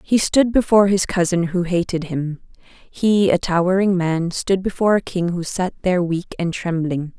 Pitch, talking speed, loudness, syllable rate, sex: 180 Hz, 185 wpm, -19 LUFS, 5.0 syllables/s, female